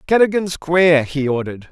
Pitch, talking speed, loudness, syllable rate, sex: 160 Hz, 140 wpm, -16 LUFS, 5.8 syllables/s, male